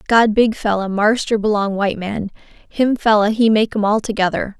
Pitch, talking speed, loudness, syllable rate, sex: 210 Hz, 170 wpm, -17 LUFS, 5.1 syllables/s, female